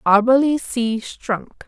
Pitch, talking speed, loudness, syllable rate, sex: 240 Hz, 105 wpm, -19 LUFS, 3.6 syllables/s, female